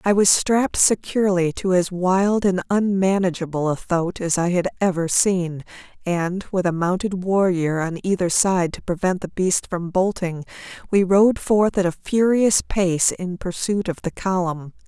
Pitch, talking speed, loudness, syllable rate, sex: 185 Hz, 170 wpm, -20 LUFS, 4.4 syllables/s, female